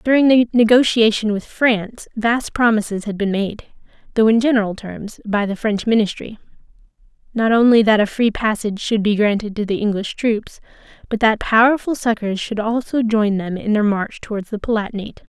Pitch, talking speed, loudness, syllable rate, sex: 215 Hz, 175 wpm, -18 LUFS, 5.3 syllables/s, female